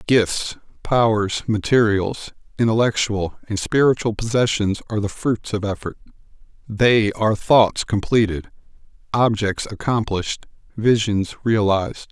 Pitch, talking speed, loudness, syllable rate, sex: 110 Hz, 100 wpm, -20 LUFS, 4.5 syllables/s, male